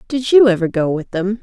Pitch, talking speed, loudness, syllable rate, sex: 205 Hz, 255 wpm, -15 LUFS, 5.5 syllables/s, female